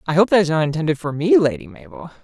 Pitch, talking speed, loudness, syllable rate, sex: 170 Hz, 270 wpm, -18 LUFS, 7.0 syllables/s, female